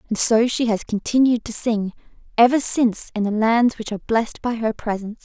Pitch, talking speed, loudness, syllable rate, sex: 225 Hz, 205 wpm, -20 LUFS, 5.8 syllables/s, female